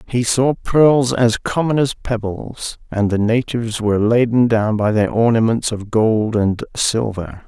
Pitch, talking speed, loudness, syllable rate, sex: 115 Hz, 160 wpm, -17 LUFS, 4.1 syllables/s, male